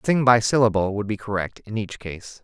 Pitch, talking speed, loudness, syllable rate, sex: 110 Hz, 220 wpm, -22 LUFS, 5.2 syllables/s, male